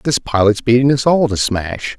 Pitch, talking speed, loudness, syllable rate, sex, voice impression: 120 Hz, 210 wpm, -15 LUFS, 4.8 syllables/s, male, masculine, very adult-like, slightly thick, slightly refreshing, sincere, slightly kind